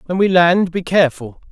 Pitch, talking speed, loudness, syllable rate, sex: 175 Hz, 195 wpm, -15 LUFS, 5.3 syllables/s, male